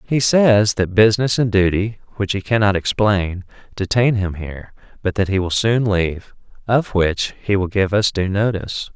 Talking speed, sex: 180 wpm, male